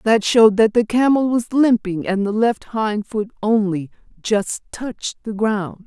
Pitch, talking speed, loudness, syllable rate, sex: 220 Hz, 175 wpm, -18 LUFS, 4.3 syllables/s, female